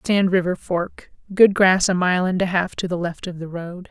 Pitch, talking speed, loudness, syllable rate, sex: 180 Hz, 230 wpm, -20 LUFS, 4.8 syllables/s, female